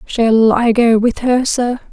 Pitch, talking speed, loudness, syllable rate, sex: 235 Hz, 190 wpm, -13 LUFS, 3.5 syllables/s, female